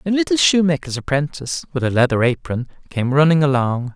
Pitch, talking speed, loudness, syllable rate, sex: 145 Hz, 165 wpm, -18 LUFS, 5.9 syllables/s, male